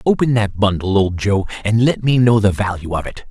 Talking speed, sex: 235 wpm, male